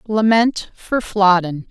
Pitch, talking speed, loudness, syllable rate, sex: 205 Hz, 105 wpm, -16 LUFS, 3.3 syllables/s, female